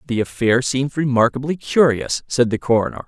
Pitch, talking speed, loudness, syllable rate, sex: 125 Hz, 155 wpm, -18 LUFS, 5.3 syllables/s, male